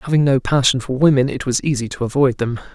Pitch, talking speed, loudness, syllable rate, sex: 130 Hz, 240 wpm, -17 LUFS, 6.4 syllables/s, male